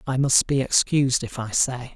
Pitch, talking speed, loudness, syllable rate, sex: 130 Hz, 215 wpm, -21 LUFS, 5.0 syllables/s, male